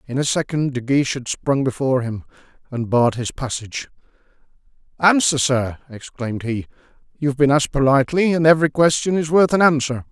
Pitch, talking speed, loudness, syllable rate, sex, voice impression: 140 Hz, 170 wpm, -19 LUFS, 6.0 syllables/s, male, masculine, slightly old, slightly thick, slightly tensed, powerful, slightly muffled, raspy, mature, wild, lively, strict, intense